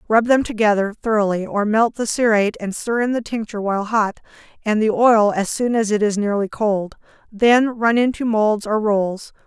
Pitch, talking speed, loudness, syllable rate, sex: 215 Hz, 195 wpm, -18 LUFS, 5.0 syllables/s, female